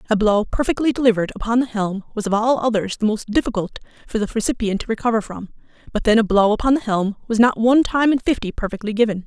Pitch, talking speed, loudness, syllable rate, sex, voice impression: 225 Hz, 225 wpm, -19 LUFS, 6.8 syllables/s, female, feminine, adult-like, tensed, powerful, clear, fluent, slightly raspy, intellectual, friendly, slightly reassuring, elegant, lively, slightly sharp